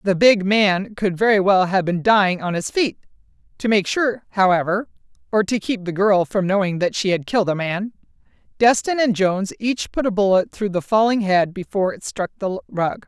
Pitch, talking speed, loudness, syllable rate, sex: 200 Hz, 195 wpm, -19 LUFS, 5.2 syllables/s, female